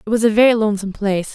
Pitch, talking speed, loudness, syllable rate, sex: 215 Hz, 265 wpm, -16 LUFS, 8.9 syllables/s, female